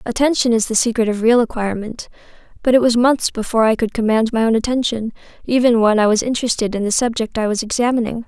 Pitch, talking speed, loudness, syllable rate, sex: 230 Hz, 210 wpm, -17 LUFS, 6.6 syllables/s, female